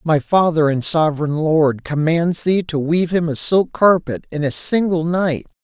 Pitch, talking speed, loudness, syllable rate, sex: 160 Hz, 180 wpm, -17 LUFS, 4.5 syllables/s, male